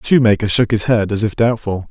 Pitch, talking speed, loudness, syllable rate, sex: 110 Hz, 250 wpm, -15 LUFS, 6.0 syllables/s, male